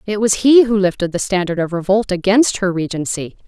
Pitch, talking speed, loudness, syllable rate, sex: 195 Hz, 205 wpm, -16 LUFS, 5.5 syllables/s, female